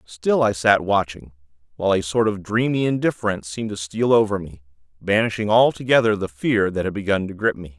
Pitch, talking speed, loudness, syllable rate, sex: 100 Hz, 195 wpm, -20 LUFS, 5.8 syllables/s, male